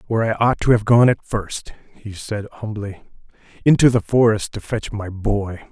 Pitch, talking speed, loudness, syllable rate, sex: 110 Hz, 190 wpm, -19 LUFS, 4.5 syllables/s, male